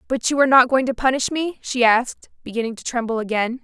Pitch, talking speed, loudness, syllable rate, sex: 245 Hz, 230 wpm, -19 LUFS, 6.4 syllables/s, female